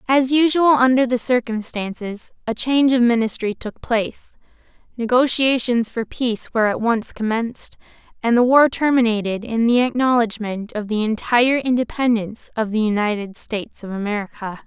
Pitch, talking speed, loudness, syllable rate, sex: 235 Hz, 145 wpm, -19 LUFS, 5.2 syllables/s, female